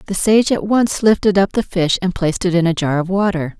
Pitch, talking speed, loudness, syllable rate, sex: 190 Hz, 265 wpm, -16 LUFS, 5.6 syllables/s, female